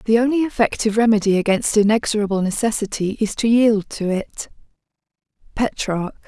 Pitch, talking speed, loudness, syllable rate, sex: 215 Hz, 125 wpm, -19 LUFS, 5.6 syllables/s, female